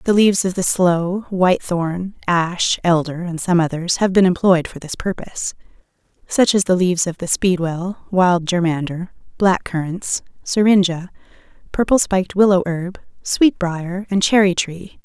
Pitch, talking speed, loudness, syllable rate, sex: 180 Hz, 155 wpm, -18 LUFS, 4.5 syllables/s, female